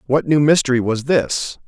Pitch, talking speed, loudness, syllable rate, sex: 135 Hz, 180 wpm, -17 LUFS, 4.8 syllables/s, male